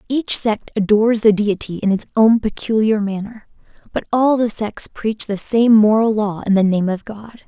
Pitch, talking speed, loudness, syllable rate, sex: 215 Hz, 195 wpm, -17 LUFS, 4.7 syllables/s, female